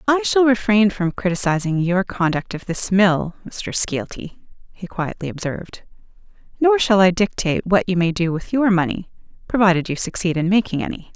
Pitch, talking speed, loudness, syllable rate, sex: 190 Hz, 165 wpm, -19 LUFS, 5.2 syllables/s, female